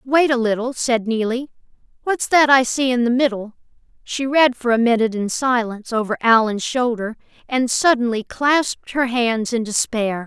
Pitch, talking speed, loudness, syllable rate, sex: 240 Hz, 170 wpm, -18 LUFS, 4.8 syllables/s, female